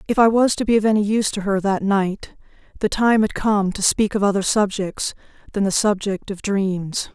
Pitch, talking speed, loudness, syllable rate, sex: 205 Hz, 220 wpm, -20 LUFS, 5.1 syllables/s, female